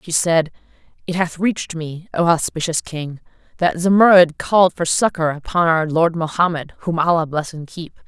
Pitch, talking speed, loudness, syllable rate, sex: 165 Hz, 170 wpm, -18 LUFS, 4.6 syllables/s, female